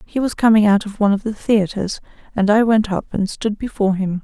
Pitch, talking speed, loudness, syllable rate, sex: 210 Hz, 240 wpm, -18 LUFS, 5.9 syllables/s, female